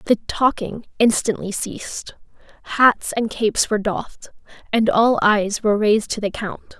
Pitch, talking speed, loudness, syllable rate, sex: 215 Hz, 150 wpm, -19 LUFS, 4.5 syllables/s, female